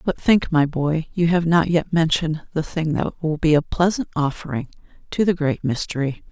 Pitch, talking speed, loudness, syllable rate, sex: 160 Hz, 200 wpm, -21 LUFS, 5.1 syllables/s, female